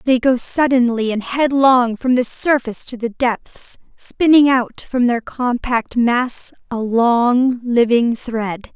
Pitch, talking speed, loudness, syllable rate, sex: 245 Hz, 145 wpm, -16 LUFS, 3.5 syllables/s, female